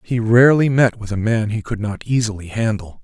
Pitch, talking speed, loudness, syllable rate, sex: 110 Hz, 215 wpm, -17 LUFS, 5.5 syllables/s, male